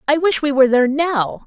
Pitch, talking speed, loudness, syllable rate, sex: 280 Hz, 245 wpm, -16 LUFS, 6.1 syllables/s, female